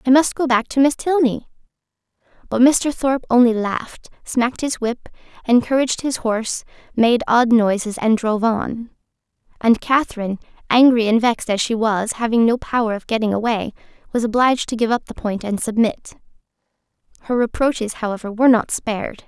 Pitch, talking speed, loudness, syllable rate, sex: 235 Hz, 165 wpm, -18 LUFS, 5.6 syllables/s, female